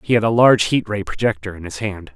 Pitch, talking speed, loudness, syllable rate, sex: 105 Hz, 280 wpm, -18 LUFS, 6.3 syllables/s, male